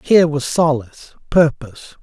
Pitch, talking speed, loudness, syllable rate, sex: 145 Hz, 120 wpm, -16 LUFS, 5.3 syllables/s, male